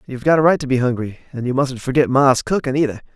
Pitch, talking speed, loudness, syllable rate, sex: 135 Hz, 265 wpm, -18 LUFS, 6.9 syllables/s, male